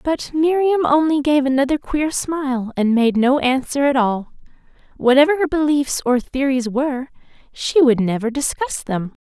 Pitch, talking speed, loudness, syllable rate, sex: 275 Hz, 155 wpm, -18 LUFS, 4.9 syllables/s, female